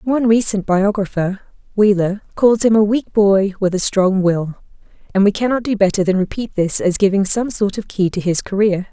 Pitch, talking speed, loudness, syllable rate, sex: 200 Hz, 200 wpm, -16 LUFS, 5.3 syllables/s, female